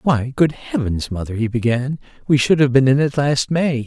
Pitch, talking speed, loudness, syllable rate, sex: 130 Hz, 215 wpm, -18 LUFS, 4.9 syllables/s, male